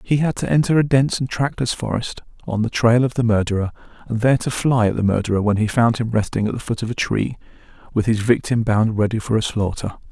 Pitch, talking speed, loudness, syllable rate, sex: 115 Hz, 235 wpm, -19 LUFS, 6.1 syllables/s, male